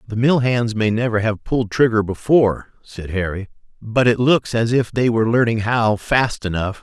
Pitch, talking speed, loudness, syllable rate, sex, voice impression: 115 Hz, 195 wpm, -18 LUFS, 5.0 syllables/s, male, masculine, adult-like, tensed, bright, fluent, friendly, reassuring, unique, wild, slightly kind